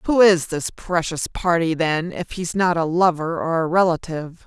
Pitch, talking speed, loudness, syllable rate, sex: 170 Hz, 200 wpm, -20 LUFS, 4.9 syllables/s, female